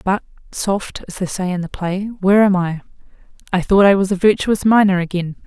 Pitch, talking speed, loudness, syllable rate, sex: 190 Hz, 210 wpm, -17 LUFS, 5.5 syllables/s, female